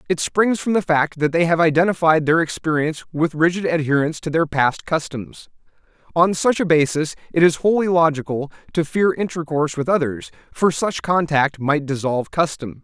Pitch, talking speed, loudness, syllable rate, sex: 160 Hz, 175 wpm, -19 LUFS, 5.3 syllables/s, male